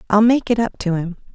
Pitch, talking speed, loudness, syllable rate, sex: 210 Hz, 265 wpm, -18 LUFS, 6.3 syllables/s, female